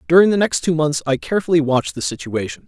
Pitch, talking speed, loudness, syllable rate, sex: 160 Hz, 225 wpm, -18 LUFS, 6.9 syllables/s, male